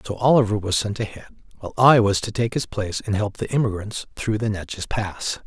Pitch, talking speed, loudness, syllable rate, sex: 105 Hz, 220 wpm, -22 LUFS, 6.0 syllables/s, male